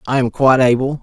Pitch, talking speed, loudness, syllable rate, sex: 130 Hz, 235 wpm, -14 LUFS, 6.7 syllables/s, male